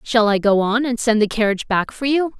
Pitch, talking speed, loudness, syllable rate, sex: 230 Hz, 275 wpm, -18 LUFS, 5.7 syllables/s, female